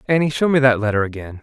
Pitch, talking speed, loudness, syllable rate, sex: 125 Hz, 255 wpm, -17 LUFS, 7.0 syllables/s, male